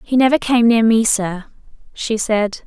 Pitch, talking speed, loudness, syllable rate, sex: 225 Hz, 180 wpm, -16 LUFS, 4.3 syllables/s, female